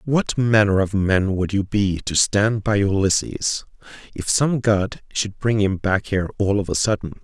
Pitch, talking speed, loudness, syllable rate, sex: 100 Hz, 190 wpm, -20 LUFS, 4.4 syllables/s, male